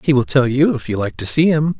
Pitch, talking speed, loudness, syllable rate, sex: 140 Hz, 335 wpm, -16 LUFS, 5.9 syllables/s, male